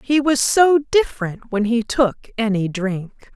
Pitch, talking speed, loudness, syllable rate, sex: 240 Hz, 160 wpm, -19 LUFS, 4.0 syllables/s, female